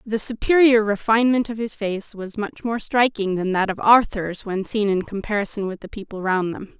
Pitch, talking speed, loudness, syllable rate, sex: 210 Hz, 205 wpm, -21 LUFS, 5.1 syllables/s, female